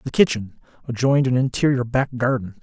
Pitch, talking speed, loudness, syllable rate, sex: 125 Hz, 160 wpm, -20 LUFS, 6.0 syllables/s, male